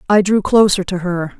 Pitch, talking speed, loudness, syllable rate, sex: 190 Hz, 215 wpm, -15 LUFS, 5.0 syllables/s, female